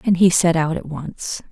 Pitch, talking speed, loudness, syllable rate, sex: 170 Hz, 240 wpm, -18 LUFS, 4.5 syllables/s, female